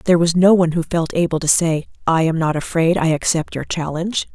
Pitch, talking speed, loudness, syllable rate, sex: 165 Hz, 235 wpm, -17 LUFS, 6.1 syllables/s, female